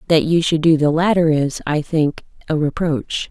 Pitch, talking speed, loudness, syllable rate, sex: 160 Hz, 180 wpm, -17 LUFS, 4.6 syllables/s, female